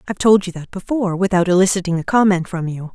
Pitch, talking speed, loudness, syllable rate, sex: 185 Hz, 225 wpm, -17 LUFS, 6.8 syllables/s, female